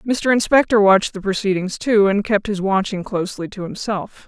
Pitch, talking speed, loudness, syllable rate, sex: 200 Hz, 180 wpm, -18 LUFS, 5.4 syllables/s, female